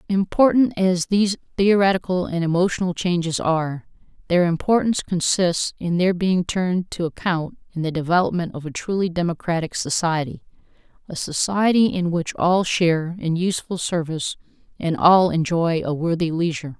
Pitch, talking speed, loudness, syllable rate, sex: 175 Hz, 145 wpm, -21 LUFS, 5.3 syllables/s, female